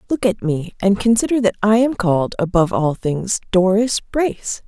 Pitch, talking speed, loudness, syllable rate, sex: 205 Hz, 180 wpm, -18 LUFS, 5.0 syllables/s, female